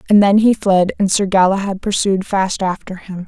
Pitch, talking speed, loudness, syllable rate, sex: 195 Hz, 200 wpm, -15 LUFS, 4.9 syllables/s, female